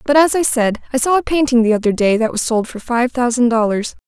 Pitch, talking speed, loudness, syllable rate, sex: 245 Hz, 265 wpm, -16 LUFS, 5.9 syllables/s, female